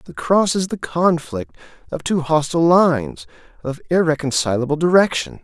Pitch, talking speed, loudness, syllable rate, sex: 155 Hz, 135 wpm, -18 LUFS, 5.0 syllables/s, male